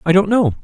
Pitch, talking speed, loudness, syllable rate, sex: 185 Hz, 285 wpm, -15 LUFS, 6.3 syllables/s, male